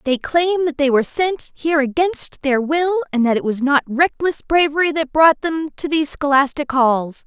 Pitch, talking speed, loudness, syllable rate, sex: 295 Hz, 200 wpm, -17 LUFS, 4.9 syllables/s, female